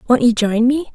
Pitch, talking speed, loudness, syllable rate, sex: 245 Hz, 255 wpm, -15 LUFS, 5.7 syllables/s, female